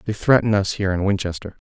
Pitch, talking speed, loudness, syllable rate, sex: 100 Hz, 215 wpm, -20 LUFS, 6.9 syllables/s, male